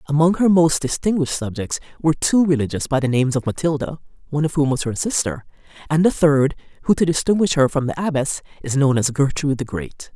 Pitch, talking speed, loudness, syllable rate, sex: 150 Hz, 205 wpm, -19 LUFS, 6.1 syllables/s, female